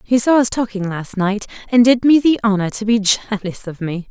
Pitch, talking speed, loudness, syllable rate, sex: 215 Hz, 235 wpm, -16 LUFS, 5.1 syllables/s, female